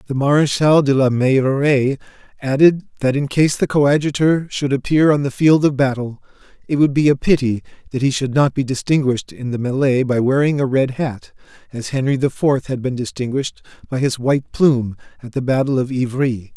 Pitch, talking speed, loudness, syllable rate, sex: 135 Hz, 190 wpm, -17 LUFS, 5.4 syllables/s, male